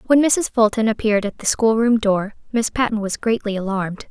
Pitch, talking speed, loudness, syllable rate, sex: 220 Hz, 205 wpm, -19 LUFS, 5.5 syllables/s, female